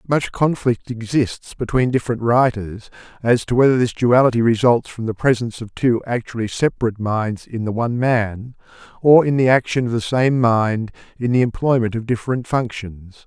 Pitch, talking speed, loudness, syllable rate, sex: 120 Hz, 170 wpm, -18 LUFS, 5.2 syllables/s, male